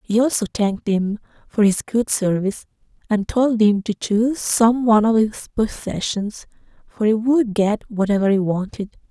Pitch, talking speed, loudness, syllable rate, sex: 215 Hz, 165 wpm, -19 LUFS, 4.8 syllables/s, female